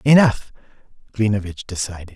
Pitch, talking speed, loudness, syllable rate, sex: 105 Hz, 85 wpm, -20 LUFS, 5.6 syllables/s, male